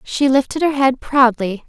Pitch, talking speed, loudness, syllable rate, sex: 260 Hz, 180 wpm, -16 LUFS, 4.5 syllables/s, female